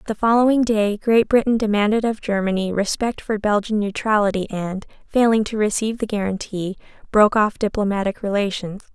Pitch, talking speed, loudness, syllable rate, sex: 210 Hz, 150 wpm, -20 LUFS, 5.6 syllables/s, female